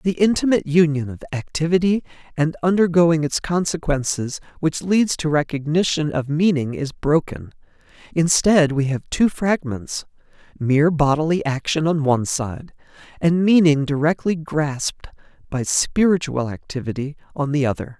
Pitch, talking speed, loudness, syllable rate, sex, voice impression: 155 Hz, 125 wpm, -20 LUFS, 4.8 syllables/s, male, masculine, very adult-like, slightly middle-aged, thick, slightly tensed, slightly weak, slightly dark, slightly soft, clear, slightly fluent, slightly cool, intellectual, slightly refreshing, sincere, very calm, slightly friendly, reassuring, unique, elegant, slightly sweet, kind, modest